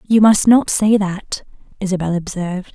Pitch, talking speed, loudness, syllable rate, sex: 195 Hz, 155 wpm, -16 LUFS, 4.8 syllables/s, female